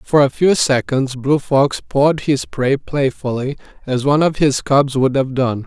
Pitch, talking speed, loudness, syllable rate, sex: 135 Hz, 190 wpm, -16 LUFS, 4.4 syllables/s, male